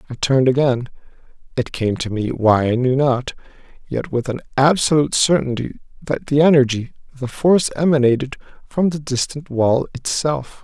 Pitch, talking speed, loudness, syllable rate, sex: 135 Hz, 145 wpm, -18 LUFS, 5.2 syllables/s, male